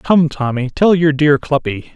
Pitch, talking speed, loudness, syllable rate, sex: 145 Hz, 185 wpm, -15 LUFS, 4.4 syllables/s, male